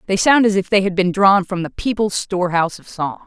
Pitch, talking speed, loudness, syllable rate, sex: 190 Hz, 275 wpm, -17 LUFS, 5.9 syllables/s, female